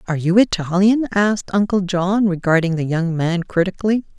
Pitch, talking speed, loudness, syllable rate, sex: 190 Hz, 160 wpm, -18 LUFS, 5.4 syllables/s, female